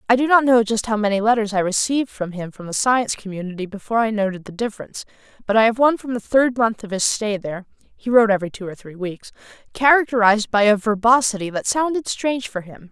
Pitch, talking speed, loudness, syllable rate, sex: 220 Hz, 230 wpm, -19 LUFS, 6.1 syllables/s, female